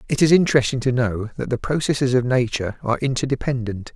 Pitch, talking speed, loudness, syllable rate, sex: 125 Hz, 180 wpm, -20 LUFS, 6.6 syllables/s, male